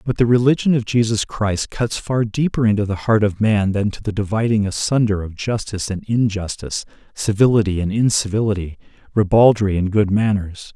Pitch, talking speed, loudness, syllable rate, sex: 105 Hz, 165 wpm, -18 LUFS, 5.4 syllables/s, male